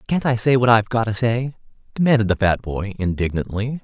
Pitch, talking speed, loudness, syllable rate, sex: 115 Hz, 205 wpm, -19 LUFS, 5.9 syllables/s, male